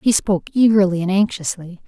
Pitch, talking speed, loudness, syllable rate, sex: 190 Hz, 160 wpm, -17 LUFS, 5.7 syllables/s, female